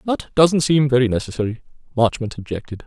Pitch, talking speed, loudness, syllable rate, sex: 130 Hz, 145 wpm, -19 LUFS, 6.0 syllables/s, male